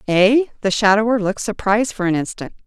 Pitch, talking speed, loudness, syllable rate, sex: 210 Hz, 180 wpm, -17 LUFS, 6.3 syllables/s, female